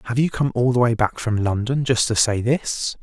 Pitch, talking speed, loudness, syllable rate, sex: 120 Hz, 260 wpm, -20 LUFS, 5.0 syllables/s, male